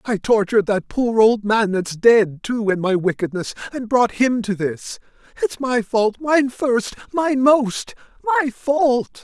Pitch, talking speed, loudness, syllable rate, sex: 225 Hz, 170 wpm, -19 LUFS, 3.8 syllables/s, male